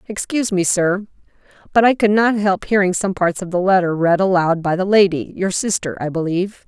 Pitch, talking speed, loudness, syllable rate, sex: 190 Hz, 200 wpm, -17 LUFS, 5.7 syllables/s, female